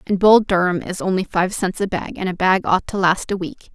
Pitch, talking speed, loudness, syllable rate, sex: 190 Hz, 275 wpm, -19 LUFS, 5.3 syllables/s, female